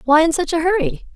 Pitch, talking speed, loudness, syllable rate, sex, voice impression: 330 Hz, 260 wpm, -18 LUFS, 6.1 syllables/s, female, feminine, slightly young, tensed, bright, slightly soft, clear, slightly cute, calm, friendly, reassuring, kind, slightly modest